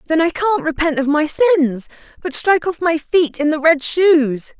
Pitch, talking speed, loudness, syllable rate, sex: 315 Hz, 210 wpm, -16 LUFS, 4.4 syllables/s, female